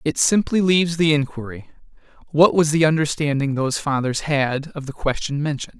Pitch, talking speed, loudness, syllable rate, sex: 150 Hz, 165 wpm, -19 LUFS, 5.5 syllables/s, male